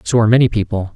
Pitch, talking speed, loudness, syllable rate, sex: 110 Hz, 250 wpm, -15 LUFS, 8.2 syllables/s, male